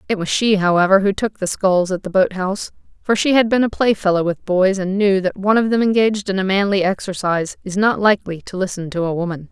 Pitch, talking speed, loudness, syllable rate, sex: 195 Hz, 245 wpm, -17 LUFS, 6.1 syllables/s, female